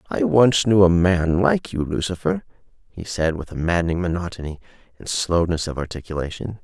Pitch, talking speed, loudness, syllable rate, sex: 90 Hz, 165 wpm, -21 LUFS, 5.4 syllables/s, male